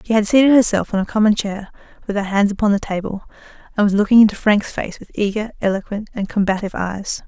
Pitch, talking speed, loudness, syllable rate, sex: 205 Hz, 215 wpm, -18 LUFS, 6.4 syllables/s, female